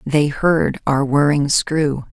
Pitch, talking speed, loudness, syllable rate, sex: 145 Hz, 140 wpm, -17 LUFS, 3.1 syllables/s, female